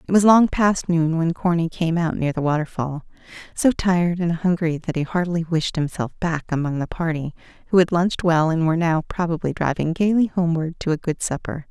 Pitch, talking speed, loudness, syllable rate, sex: 170 Hz, 205 wpm, -21 LUFS, 5.5 syllables/s, female